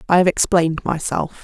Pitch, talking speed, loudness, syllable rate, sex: 170 Hz, 165 wpm, -18 LUFS, 5.8 syllables/s, female